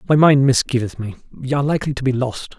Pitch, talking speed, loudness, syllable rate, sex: 130 Hz, 230 wpm, -18 LUFS, 7.0 syllables/s, male